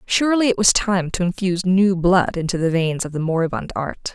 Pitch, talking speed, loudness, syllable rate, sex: 180 Hz, 215 wpm, -19 LUFS, 5.5 syllables/s, female